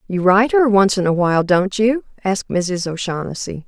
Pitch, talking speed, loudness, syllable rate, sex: 195 Hz, 195 wpm, -17 LUFS, 5.5 syllables/s, female